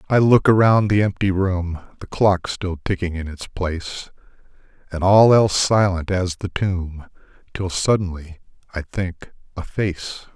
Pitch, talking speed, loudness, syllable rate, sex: 90 Hz, 150 wpm, -19 LUFS, 4.4 syllables/s, male